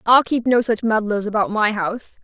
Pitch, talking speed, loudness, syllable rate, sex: 220 Hz, 215 wpm, -19 LUFS, 5.3 syllables/s, female